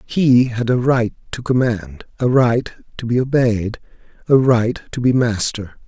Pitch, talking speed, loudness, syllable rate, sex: 120 Hz, 165 wpm, -17 LUFS, 4.2 syllables/s, male